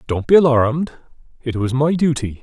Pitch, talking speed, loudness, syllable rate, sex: 135 Hz, 175 wpm, -17 LUFS, 5.1 syllables/s, male